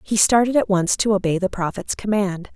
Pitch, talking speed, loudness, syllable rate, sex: 200 Hz, 210 wpm, -20 LUFS, 5.4 syllables/s, female